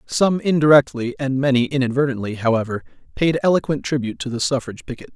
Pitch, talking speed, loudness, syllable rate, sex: 135 Hz, 150 wpm, -19 LUFS, 6.6 syllables/s, male